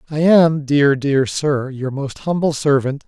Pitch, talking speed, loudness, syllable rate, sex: 145 Hz, 175 wpm, -17 LUFS, 3.9 syllables/s, male